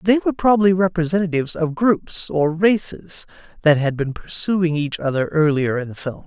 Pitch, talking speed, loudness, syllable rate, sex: 170 Hz, 170 wpm, -19 LUFS, 5.2 syllables/s, male